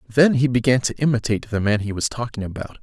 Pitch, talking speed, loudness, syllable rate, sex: 120 Hz, 235 wpm, -20 LUFS, 6.5 syllables/s, male